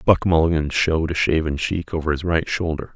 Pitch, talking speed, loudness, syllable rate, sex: 80 Hz, 205 wpm, -21 LUFS, 5.7 syllables/s, male